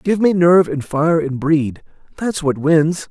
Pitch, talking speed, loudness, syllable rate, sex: 160 Hz, 195 wpm, -16 LUFS, 4.2 syllables/s, male